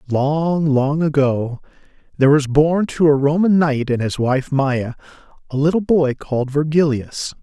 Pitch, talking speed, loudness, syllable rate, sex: 145 Hz, 155 wpm, -17 LUFS, 4.4 syllables/s, male